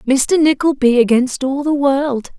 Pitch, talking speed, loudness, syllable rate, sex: 270 Hz, 150 wpm, -15 LUFS, 4.1 syllables/s, female